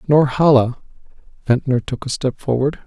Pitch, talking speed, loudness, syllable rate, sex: 135 Hz, 125 wpm, -18 LUFS, 5.0 syllables/s, male